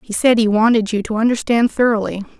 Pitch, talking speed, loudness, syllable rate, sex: 220 Hz, 200 wpm, -16 LUFS, 6.1 syllables/s, female